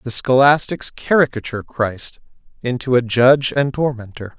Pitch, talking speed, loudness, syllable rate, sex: 125 Hz, 125 wpm, -17 LUFS, 4.9 syllables/s, male